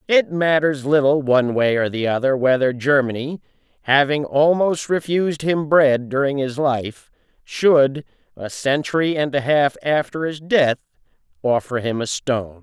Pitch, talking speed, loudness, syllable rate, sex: 140 Hz, 145 wpm, -19 LUFS, 4.5 syllables/s, male